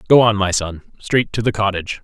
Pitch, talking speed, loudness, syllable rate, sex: 105 Hz, 205 wpm, -17 LUFS, 5.9 syllables/s, male